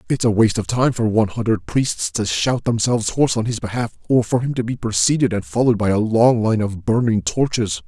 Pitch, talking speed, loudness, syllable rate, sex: 110 Hz, 235 wpm, -19 LUFS, 5.8 syllables/s, male